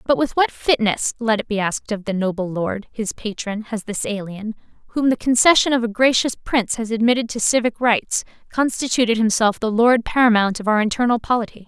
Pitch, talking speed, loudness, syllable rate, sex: 225 Hz, 195 wpm, -19 LUFS, 5.6 syllables/s, female